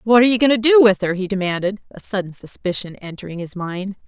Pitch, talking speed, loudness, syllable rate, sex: 200 Hz, 235 wpm, -18 LUFS, 6.4 syllables/s, female